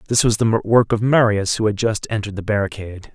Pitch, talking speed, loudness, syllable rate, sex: 105 Hz, 230 wpm, -18 LUFS, 6.2 syllables/s, male